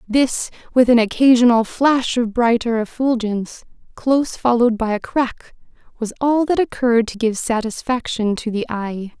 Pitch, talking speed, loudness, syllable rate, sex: 235 Hz, 150 wpm, -18 LUFS, 4.9 syllables/s, female